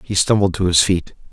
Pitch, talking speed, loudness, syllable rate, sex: 90 Hz, 225 wpm, -16 LUFS, 5.6 syllables/s, male